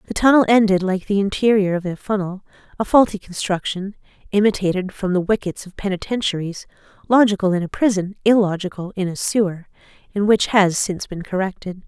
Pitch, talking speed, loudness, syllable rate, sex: 195 Hz, 160 wpm, -19 LUFS, 5.8 syllables/s, female